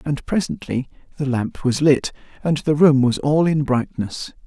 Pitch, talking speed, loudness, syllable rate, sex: 140 Hz, 175 wpm, -19 LUFS, 4.4 syllables/s, male